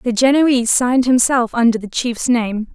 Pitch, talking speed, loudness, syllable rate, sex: 240 Hz, 175 wpm, -15 LUFS, 4.9 syllables/s, female